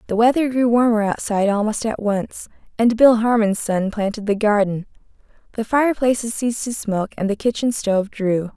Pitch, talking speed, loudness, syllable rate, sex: 220 Hz, 175 wpm, -19 LUFS, 5.5 syllables/s, female